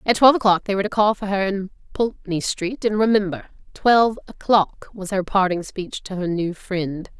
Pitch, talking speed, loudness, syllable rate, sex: 195 Hz, 190 wpm, -21 LUFS, 5.3 syllables/s, female